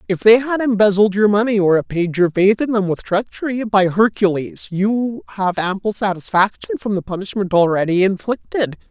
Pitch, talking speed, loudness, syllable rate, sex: 200 Hz, 170 wpm, -17 LUFS, 5.1 syllables/s, male